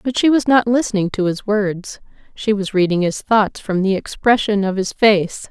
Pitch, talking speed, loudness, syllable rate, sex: 205 Hz, 205 wpm, -17 LUFS, 4.7 syllables/s, female